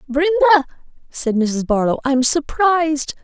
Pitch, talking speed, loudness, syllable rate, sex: 290 Hz, 130 wpm, -17 LUFS, 4.9 syllables/s, female